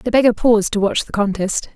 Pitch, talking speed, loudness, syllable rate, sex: 215 Hz, 240 wpm, -17 LUFS, 6.0 syllables/s, female